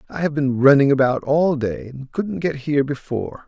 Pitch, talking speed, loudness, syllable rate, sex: 140 Hz, 205 wpm, -19 LUFS, 5.2 syllables/s, male